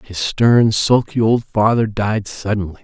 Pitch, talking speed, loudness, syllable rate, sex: 105 Hz, 150 wpm, -16 LUFS, 4.0 syllables/s, male